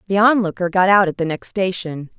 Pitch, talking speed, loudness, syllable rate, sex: 185 Hz, 220 wpm, -17 LUFS, 5.6 syllables/s, female